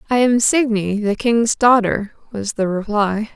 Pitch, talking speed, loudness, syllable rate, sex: 220 Hz, 160 wpm, -17 LUFS, 4.0 syllables/s, female